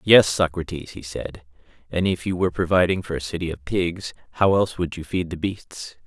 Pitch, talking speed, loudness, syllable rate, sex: 85 Hz, 210 wpm, -23 LUFS, 5.4 syllables/s, male